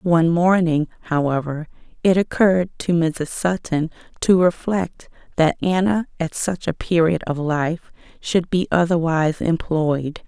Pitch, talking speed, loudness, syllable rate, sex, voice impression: 170 Hz, 130 wpm, -20 LUFS, 4.3 syllables/s, female, feminine, middle-aged, slightly relaxed, slightly hard, raspy, calm, friendly, reassuring, modest